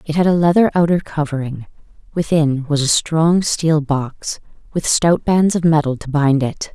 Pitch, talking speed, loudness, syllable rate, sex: 155 Hz, 180 wpm, -17 LUFS, 4.5 syllables/s, female